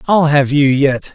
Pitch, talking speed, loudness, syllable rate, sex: 145 Hz, 210 wpm, -13 LUFS, 4.0 syllables/s, male